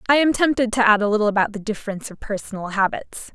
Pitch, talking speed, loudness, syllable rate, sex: 220 Hz, 235 wpm, -20 LUFS, 7.0 syllables/s, female